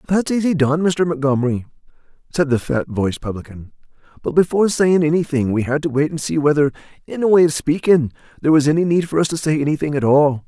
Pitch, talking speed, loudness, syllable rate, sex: 150 Hz, 210 wpm, -18 LUFS, 6.2 syllables/s, male